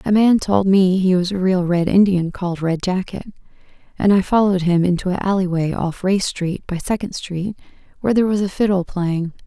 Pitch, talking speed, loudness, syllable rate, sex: 185 Hz, 210 wpm, -18 LUFS, 5.5 syllables/s, female